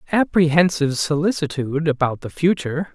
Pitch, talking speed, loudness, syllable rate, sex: 155 Hz, 100 wpm, -19 LUFS, 6.0 syllables/s, male